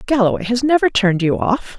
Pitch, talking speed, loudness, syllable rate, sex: 225 Hz, 200 wpm, -16 LUFS, 6.1 syllables/s, female